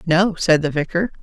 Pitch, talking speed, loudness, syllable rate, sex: 170 Hz, 195 wpm, -18 LUFS, 5.0 syllables/s, female